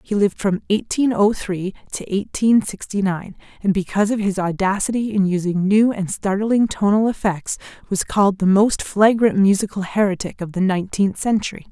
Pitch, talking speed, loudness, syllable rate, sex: 200 Hz, 170 wpm, -19 LUFS, 5.2 syllables/s, female